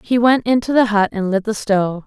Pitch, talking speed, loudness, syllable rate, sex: 215 Hz, 260 wpm, -16 LUFS, 5.7 syllables/s, female